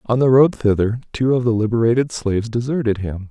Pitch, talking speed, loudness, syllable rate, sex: 115 Hz, 200 wpm, -18 LUFS, 5.9 syllables/s, male